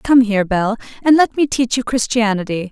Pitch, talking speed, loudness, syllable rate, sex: 230 Hz, 200 wpm, -16 LUFS, 5.4 syllables/s, female